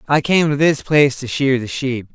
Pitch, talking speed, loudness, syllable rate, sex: 140 Hz, 250 wpm, -16 LUFS, 5.1 syllables/s, male